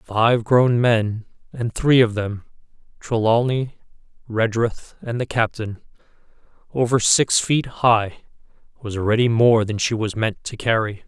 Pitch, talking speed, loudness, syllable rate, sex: 115 Hz, 125 wpm, -20 LUFS, 4.0 syllables/s, male